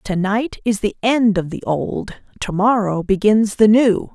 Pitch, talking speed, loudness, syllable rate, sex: 210 Hz, 160 wpm, -17 LUFS, 4.0 syllables/s, female